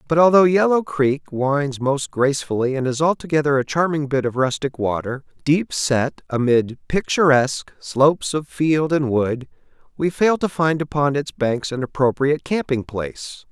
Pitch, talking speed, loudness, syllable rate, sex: 145 Hz, 160 wpm, -20 LUFS, 4.7 syllables/s, male